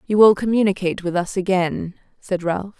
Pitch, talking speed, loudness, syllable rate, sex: 190 Hz, 170 wpm, -19 LUFS, 5.4 syllables/s, female